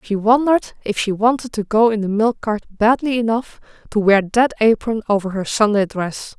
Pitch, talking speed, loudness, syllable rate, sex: 220 Hz, 195 wpm, -18 LUFS, 5.0 syllables/s, female